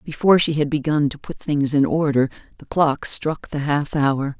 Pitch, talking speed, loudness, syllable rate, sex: 145 Hz, 205 wpm, -20 LUFS, 4.8 syllables/s, female